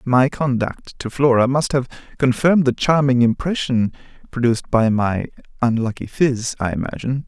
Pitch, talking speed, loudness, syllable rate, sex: 125 Hz, 140 wpm, -19 LUFS, 5.1 syllables/s, male